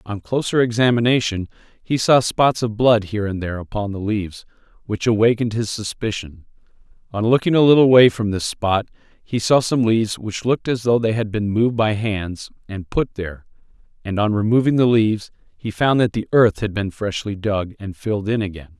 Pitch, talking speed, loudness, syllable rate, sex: 110 Hz, 195 wpm, -19 LUFS, 5.4 syllables/s, male